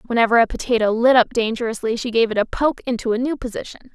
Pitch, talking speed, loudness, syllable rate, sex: 235 Hz, 230 wpm, -19 LUFS, 7.0 syllables/s, female